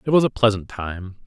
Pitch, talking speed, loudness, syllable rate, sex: 110 Hz, 240 wpm, -21 LUFS, 5.6 syllables/s, male